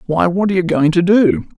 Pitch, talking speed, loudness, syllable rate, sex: 175 Hz, 265 wpm, -14 LUFS, 5.9 syllables/s, male